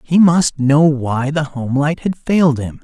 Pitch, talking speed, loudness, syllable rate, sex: 145 Hz, 190 wpm, -15 LUFS, 4.4 syllables/s, male